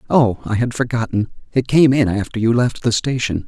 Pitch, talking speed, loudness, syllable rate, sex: 120 Hz, 205 wpm, -18 LUFS, 5.3 syllables/s, male